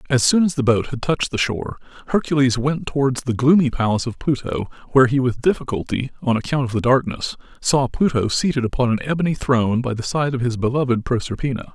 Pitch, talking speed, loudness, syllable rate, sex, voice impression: 130 Hz, 205 wpm, -20 LUFS, 6.3 syllables/s, male, masculine, very adult-like, slightly thick, fluent, cool, slightly intellectual